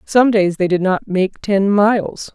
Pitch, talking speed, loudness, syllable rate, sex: 200 Hz, 205 wpm, -16 LUFS, 4.0 syllables/s, female